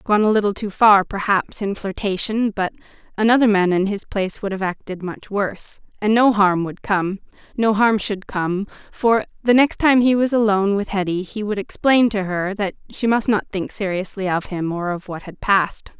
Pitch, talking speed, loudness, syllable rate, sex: 200 Hz, 205 wpm, -19 LUFS, 5.0 syllables/s, female